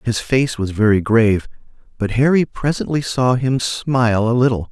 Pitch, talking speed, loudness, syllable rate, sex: 120 Hz, 165 wpm, -17 LUFS, 4.9 syllables/s, male